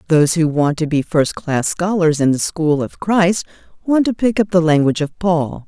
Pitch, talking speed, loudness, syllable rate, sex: 165 Hz, 210 wpm, -16 LUFS, 4.9 syllables/s, female